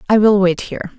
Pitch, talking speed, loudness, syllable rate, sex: 200 Hz, 245 wpm, -14 LUFS, 7.7 syllables/s, female